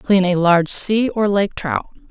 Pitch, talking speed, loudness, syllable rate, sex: 190 Hz, 200 wpm, -17 LUFS, 4.4 syllables/s, female